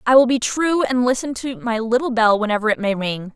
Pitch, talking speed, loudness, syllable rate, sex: 235 Hz, 250 wpm, -19 LUFS, 5.6 syllables/s, female